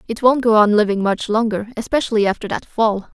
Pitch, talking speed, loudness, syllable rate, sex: 220 Hz, 205 wpm, -17 LUFS, 5.9 syllables/s, female